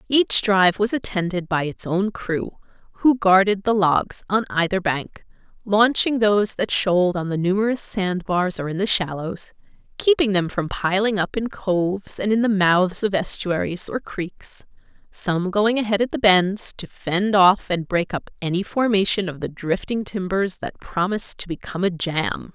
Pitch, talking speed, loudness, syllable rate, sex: 190 Hz, 175 wpm, -21 LUFS, 4.6 syllables/s, female